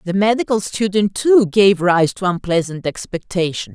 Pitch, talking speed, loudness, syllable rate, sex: 190 Hz, 145 wpm, -17 LUFS, 4.6 syllables/s, female